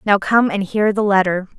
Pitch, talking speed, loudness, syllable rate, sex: 200 Hz, 225 wpm, -16 LUFS, 5.0 syllables/s, female